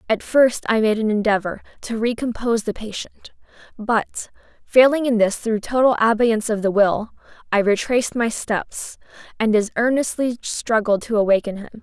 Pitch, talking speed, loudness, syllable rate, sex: 225 Hz, 160 wpm, -20 LUFS, 5.0 syllables/s, female